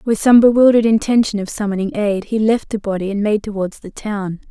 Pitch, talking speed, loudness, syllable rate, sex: 210 Hz, 215 wpm, -16 LUFS, 5.8 syllables/s, female